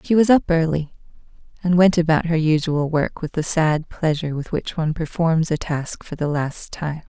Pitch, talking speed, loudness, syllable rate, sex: 160 Hz, 200 wpm, -20 LUFS, 5.0 syllables/s, female